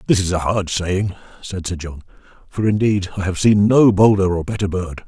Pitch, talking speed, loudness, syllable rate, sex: 95 Hz, 200 wpm, -18 LUFS, 4.9 syllables/s, male